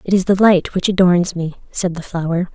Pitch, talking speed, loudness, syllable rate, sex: 180 Hz, 235 wpm, -16 LUFS, 5.2 syllables/s, female